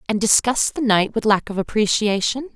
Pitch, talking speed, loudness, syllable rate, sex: 220 Hz, 190 wpm, -19 LUFS, 5.2 syllables/s, female